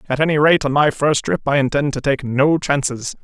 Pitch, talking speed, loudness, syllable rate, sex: 140 Hz, 240 wpm, -17 LUFS, 5.4 syllables/s, male